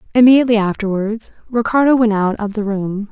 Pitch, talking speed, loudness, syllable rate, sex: 220 Hz, 155 wpm, -15 LUFS, 6.1 syllables/s, female